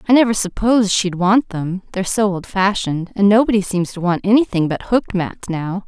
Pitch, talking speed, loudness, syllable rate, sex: 195 Hz, 185 wpm, -17 LUFS, 5.6 syllables/s, female